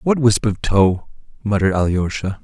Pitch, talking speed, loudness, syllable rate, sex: 105 Hz, 150 wpm, -18 LUFS, 4.9 syllables/s, male